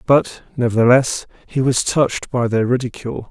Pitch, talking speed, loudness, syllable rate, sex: 125 Hz, 145 wpm, -18 LUFS, 5.3 syllables/s, male